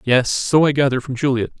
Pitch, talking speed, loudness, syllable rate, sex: 135 Hz, 225 wpm, -17 LUFS, 6.3 syllables/s, male